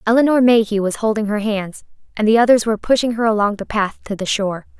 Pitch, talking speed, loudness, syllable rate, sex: 215 Hz, 225 wpm, -17 LUFS, 6.4 syllables/s, female